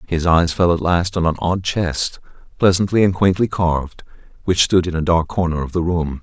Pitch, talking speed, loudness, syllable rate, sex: 85 Hz, 210 wpm, -18 LUFS, 5.1 syllables/s, male